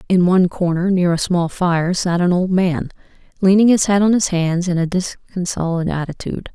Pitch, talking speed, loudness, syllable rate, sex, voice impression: 180 Hz, 195 wpm, -17 LUFS, 5.3 syllables/s, female, feminine, adult-like, slightly dark, slightly cool, intellectual, calm